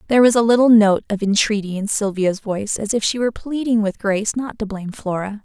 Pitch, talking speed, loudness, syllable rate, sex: 215 Hz, 230 wpm, -18 LUFS, 6.2 syllables/s, female